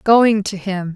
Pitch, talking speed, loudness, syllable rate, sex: 200 Hz, 190 wpm, -17 LUFS, 3.5 syllables/s, female